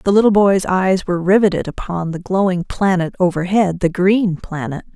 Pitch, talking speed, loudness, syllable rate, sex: 185 Hz, 170 wpm, -16 LUFS, 5.0 syllables/s, female